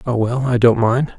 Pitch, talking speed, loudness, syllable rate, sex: 120 Hz, 205 wpm, -16 LUFS, 4.8 syllables/s, male